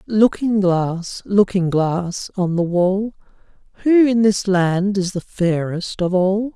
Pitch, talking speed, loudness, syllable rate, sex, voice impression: 190 Hz, 145 wpm, -18 LUFS, 3.4 syllables/s, male, masculine, adult-like, relaxed, slightly weak, soft, slightly muffled, calm, friendly, reassuring, kind, modest